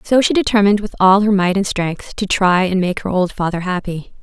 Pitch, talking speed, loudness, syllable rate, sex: 195 Hz, 240 wpm, -16 LUFS, 5.5 syllables/s, female